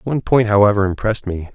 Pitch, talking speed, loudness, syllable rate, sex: 105 Hz, 195 wpm, -16 LUFS, 6.9 syllables/s, male